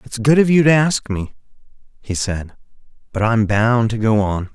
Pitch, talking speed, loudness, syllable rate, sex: 115 Hz, 200 wpm, -17 LUFS, 4.8 syllables/s, male